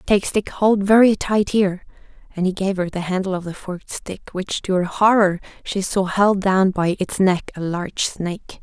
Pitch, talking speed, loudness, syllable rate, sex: 190 Hz, 210 wpm, -20 LUFS, 4.8 syllables/s, female